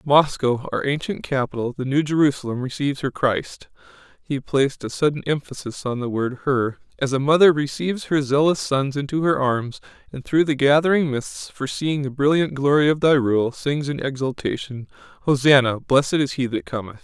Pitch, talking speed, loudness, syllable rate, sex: 135 Hz, 170 wpm, -21 LUFS, 5.3 syllables/s, male